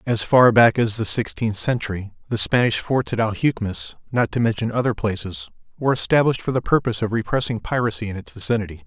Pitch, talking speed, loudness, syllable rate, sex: 115 Hz, 175 wpm, -21 LUFS, 6.3 syllables/s, male